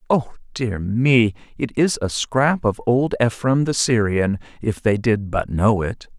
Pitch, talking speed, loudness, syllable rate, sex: 115 Hz, 175 wpm, -20 LUFS, 3.9 syllables/s, male